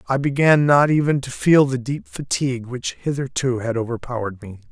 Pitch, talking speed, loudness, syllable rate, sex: 130 Hz, 180 wpm, -20 LUFS, 5.4 syllables/s, male